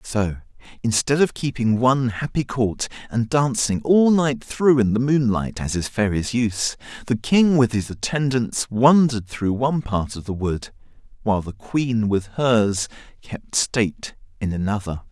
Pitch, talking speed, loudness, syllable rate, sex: 120 Hz, 160 wpm, -21 LUFS, 4.4 syllables/s, male